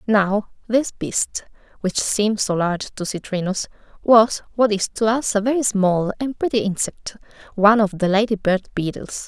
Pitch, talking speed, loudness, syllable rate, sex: 210 Hz, 170 wpm, -20 LUFS, 4.8 syllables/s, female